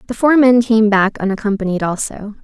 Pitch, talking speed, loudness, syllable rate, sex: 215 Hz, 175 wpm, -14 LUFS, 5.4 syllables/s, female